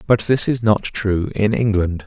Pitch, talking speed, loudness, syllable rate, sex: 105 Hz, 205 wpm, -18 LUFS, 4.2 syllables/s, male